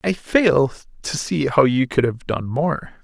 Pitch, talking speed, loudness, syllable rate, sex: 145 Hz, 200 wpm, -20 LUFS, 3.9 syllables/s, male